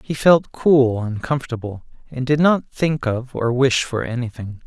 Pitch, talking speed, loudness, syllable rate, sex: 130 Hz, 180 wpm, -19 LUFS, 4.4 syllables/s, male